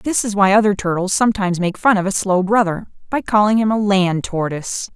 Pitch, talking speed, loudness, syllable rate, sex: 200 Hz, 220 wpm, -17 LUFS, 5.8 syllables/s, female